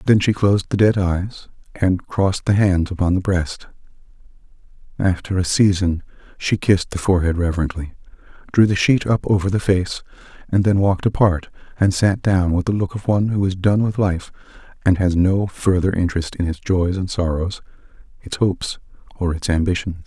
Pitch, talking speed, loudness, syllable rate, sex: 95 Hz, 180 wpm, -19 LUFS, 5.5 syllables/s, male